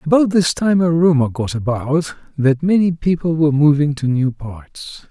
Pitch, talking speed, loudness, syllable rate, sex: 150 Hz, 175 wpm, -16 LUFS, 4.6 syllables/s, male